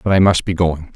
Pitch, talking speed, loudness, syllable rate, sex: 85 Hz, 315 wpm, -16 LUFS, 5.9 syllables/s, male